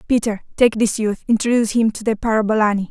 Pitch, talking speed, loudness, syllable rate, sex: 220 Hz, 185 wpm, -18 LUFS, 6.6 syllables/s, female